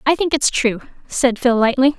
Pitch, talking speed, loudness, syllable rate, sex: 255 Hz, 210 wpm, -17 LUFS, 5.0 syllables/s, female